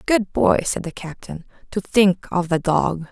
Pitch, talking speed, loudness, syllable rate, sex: 180 Hz, 195 wpm, -20 LUFS, 4.1 syllables/s, female